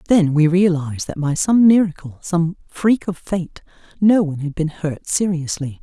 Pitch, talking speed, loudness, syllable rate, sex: 170 Hz, 175 wpm, -18 LUFS, 4.7 syllables/s, female